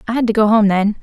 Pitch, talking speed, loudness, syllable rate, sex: 215 Hz, 350 wpm, -14 LUFS, 7.2 syllables/s, female